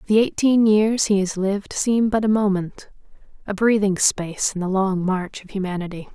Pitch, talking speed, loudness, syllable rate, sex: 200 Hz, 185 wpm, -20 LUFS, 5.0 syllables/s, female